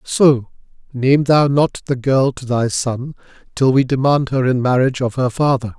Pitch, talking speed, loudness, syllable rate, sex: 130 Hz, 185 wpm, -16 LUFS, 4.6 syllables/s, male